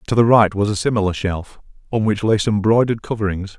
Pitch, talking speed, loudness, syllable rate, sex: 105 Hz, 220 wpm, -18 LUFS, 6.1 syllables/s, male